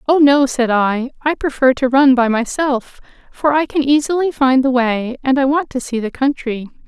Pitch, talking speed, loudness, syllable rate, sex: 265 Hz, 210 wpm, -15 LUFS, 4.8 syllables/s, female